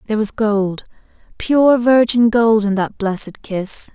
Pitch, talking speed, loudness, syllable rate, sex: 220 Hz, 150 wpm, -16 LUFS, 4.2 syllables/s, female